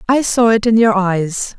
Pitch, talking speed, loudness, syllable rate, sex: 215 Hz, 225 wpm, -14 LUFS, 4.2 syllables/s, female